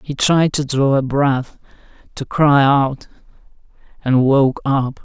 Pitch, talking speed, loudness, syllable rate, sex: 140 Hz, 130 wpm, -16 LUFS, 3.6 syllables/s, male